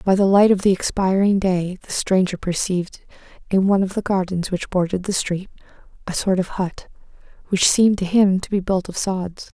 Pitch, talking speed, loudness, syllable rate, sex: 190 Hz, 200 wpm, -20 LUFS, 5.4 syllables/s, female